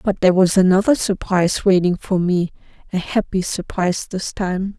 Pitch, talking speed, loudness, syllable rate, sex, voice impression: 185 Hz, 165 wpm, -18 LUFS, 5.3 syllables/s, female, feminine, adult-like, relaxed, slightly weak, slightly soft, halting, calm, friendly, reassuring, elegant, kind, modest